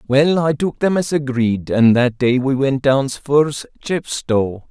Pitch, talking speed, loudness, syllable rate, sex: 135 Hz, 180 wpm, -17 LUFS, 3.6 syllables/s, male